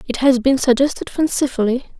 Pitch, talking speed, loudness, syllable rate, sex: 265 Hz, 150 wpm, -17 LUFS, 5.5 syllables/s, female